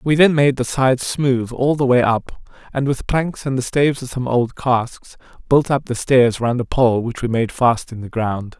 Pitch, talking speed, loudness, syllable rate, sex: 125 Hz, 235 wpm, -18 LUFS, 4.5 syllables/s, male